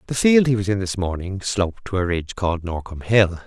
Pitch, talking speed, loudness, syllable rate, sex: 100 Hz, 240 wpm, -21 LUFS, 6.2 syllables/s, male